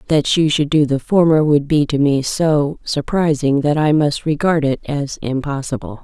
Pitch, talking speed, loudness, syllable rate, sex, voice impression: 145 Hz, 190 wpm, -16 LUFS, 4.6 syllables/s, female, feminine, gender-neutral, very adult-like, middle-aged, slightly thin, slightly relaxed, slightly weak, slightly bright, soft, very clear, very fluent, slightly cute, cool, very intellectual, refreshing, sincere, calm, friendly, reassuring, unique, very elegant, very sweet, lively, kind, slightly modest, light